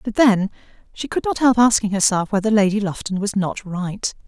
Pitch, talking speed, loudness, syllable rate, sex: 210 Hz, 195 wpm, -19 LUFS, 5.2 syllables/s, female